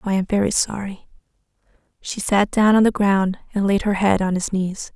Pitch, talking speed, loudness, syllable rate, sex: 200 Hz, 205 wpm, -19 LUFS, 5.0 syllables/s, female